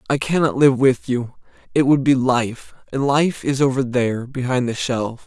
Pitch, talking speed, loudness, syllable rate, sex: 130 Hz, 195 wpm, -19 LUFS, 4.6 syllables/s, male